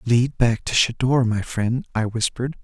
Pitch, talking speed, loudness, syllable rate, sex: 120 Hz, 180 wpm, -21 LUFS, 4.6 syllables/s, male